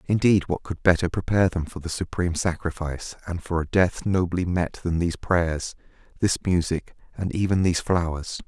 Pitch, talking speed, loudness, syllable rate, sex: 90 Hz, 175 wpm, -24 LUFS, 5.4 syllables/s, male